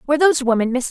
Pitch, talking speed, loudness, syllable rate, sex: 270 Hz, 200 wpm, -17 LUFS, 8.8 syllables/s, female